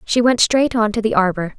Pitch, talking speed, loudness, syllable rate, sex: 220 Hz, 265 wpm, -16 LUFS, 5.4 syllables/s, female